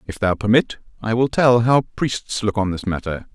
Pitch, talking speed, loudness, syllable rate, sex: 110 Hz, 215 wpm, -19 LUFS, 4.9 syllables/s, male